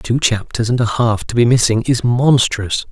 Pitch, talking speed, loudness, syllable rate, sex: 115 Hz, 205 wpm, -15 LUFS, 4.6 syllables/s, male